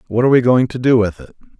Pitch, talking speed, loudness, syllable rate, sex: 120 Hz, 300 wpm, -14 LUFS, 7.1 syllables/s, male